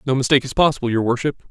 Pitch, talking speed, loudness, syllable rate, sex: 130 Hz, 240 wpm, -18 LUFS, 8.3 syllables/s, male